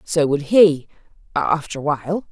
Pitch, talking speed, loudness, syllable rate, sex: 160 Hz, 130 wpm, -18 LUFS, 4.6 syllables/s, female